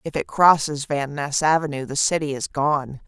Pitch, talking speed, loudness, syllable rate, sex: 145 Hz, 195 wpm, -21 LUFS, 4.8 syllables/s, female